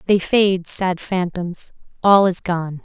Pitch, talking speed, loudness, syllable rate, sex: 185 Hz, 150 wpm, -18 LUFS, 3.4 syllables/s, female